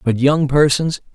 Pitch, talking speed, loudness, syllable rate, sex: 140 Hz, 155 wpm, -16 LUFS, 4.3 syllables/s, male